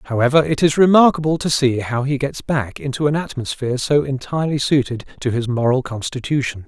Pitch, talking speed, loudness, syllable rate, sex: 135 Hz, 180 wpm, -18 LUFS, 5.7 syllables/s, male